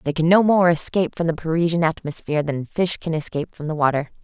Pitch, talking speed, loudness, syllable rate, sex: 160 Hz, 225 wpm, -21 LUFS, 6.5 syllables/s, female